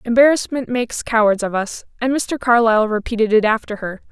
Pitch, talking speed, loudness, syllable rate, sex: 230 Hz, 175 wpm, -17 LUFS, 5.8 syllables/s, female